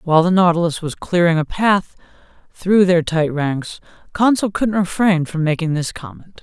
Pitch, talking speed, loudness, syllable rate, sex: 175 Hz, 170 wpm, -17 LUFS, 4.7 syllables/s, male